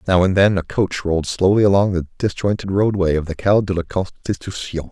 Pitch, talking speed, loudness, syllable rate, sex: 95 Hz, 210 wpm, -18 LUFS, 5.9 syllables/s, male